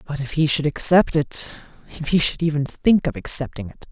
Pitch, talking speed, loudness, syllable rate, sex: 150 Hz, 215 wpm, -19 LUFS, 5.3 syllables/s, female